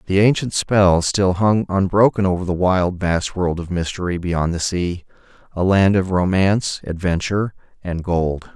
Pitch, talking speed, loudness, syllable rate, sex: 90 Hz, 155 wpm, -19 LUFS, 4.5 syllables/s, male